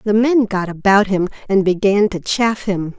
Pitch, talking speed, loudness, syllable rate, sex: 200 Hz, 200 wpm, -16 LUFS, 4.5 syllables/s, female